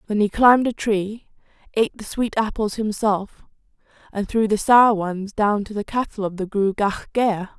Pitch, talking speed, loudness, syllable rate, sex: 210 Hz, 180 wpm, -21 LUFS, 5.0 syllables/s, female